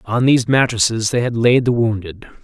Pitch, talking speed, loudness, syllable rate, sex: 115 Hz, 195 wpm, -16 LUFS, 5.5 syllables/s, male